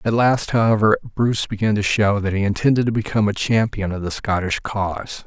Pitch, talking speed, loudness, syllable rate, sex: 105 Hz, 205 wpm, -19 LUFS, 5.8 syllables/s, male